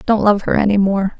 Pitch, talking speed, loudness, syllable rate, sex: 200 Hz, 250 wpm, -15 LUFS, 5.8 syllables/s, female